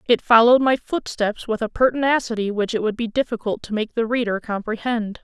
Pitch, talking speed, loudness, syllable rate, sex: 225 Hz, 195 wpm, -20 LUFS, 5.7 syllables/s, female